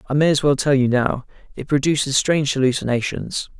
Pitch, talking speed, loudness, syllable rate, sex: 140 Hz, 185 wpm, -19 LUFS, 5.8 syllables/s, male